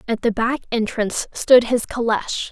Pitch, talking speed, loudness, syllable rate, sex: 230 Hz, 165 wpm, -19 LUFS, 5.0 syllables/s, female